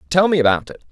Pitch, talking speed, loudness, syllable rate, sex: 140 Hz, 265 wpm, -17 LUFS, 7.7 syllables/s, male